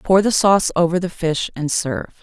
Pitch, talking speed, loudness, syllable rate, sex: 175 Hz, 215 wpm, -18 LUFS, 5.8 syllables/s, female